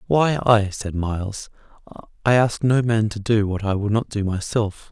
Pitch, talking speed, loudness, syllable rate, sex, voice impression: 110 Hz, 195 wpm, -21 LUFS, 4.5 syllables/s, male, masculine, slightly young, slightly adult-like, thick, relaxed, weak, dark, soft, slightly clear, slightly halting, raspy, slightly cool, intellectual, sincere, very calm, very mature, friendly, reassuring, unique, elegant, sweet, slightly lively, very kind, modest